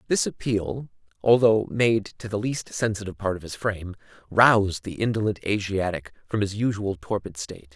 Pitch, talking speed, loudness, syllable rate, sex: 105 Hz, 160 wpm, -24 LUFS, 5.3 syllables/s, male